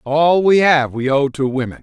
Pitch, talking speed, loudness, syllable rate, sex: 145 Hz, 230 wpm, -15 LUFS, 4.7 syllables/s, male